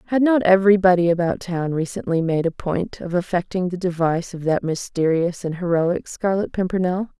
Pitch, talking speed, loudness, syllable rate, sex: 180 Hz, 165 wpm, -20 LUFS, 5.4 syllables/s, female